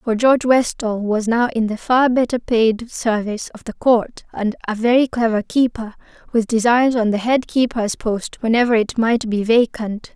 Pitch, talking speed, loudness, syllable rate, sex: 230 Hz, 175 wpm, -18 LUFS, 4.7 syllables/s, female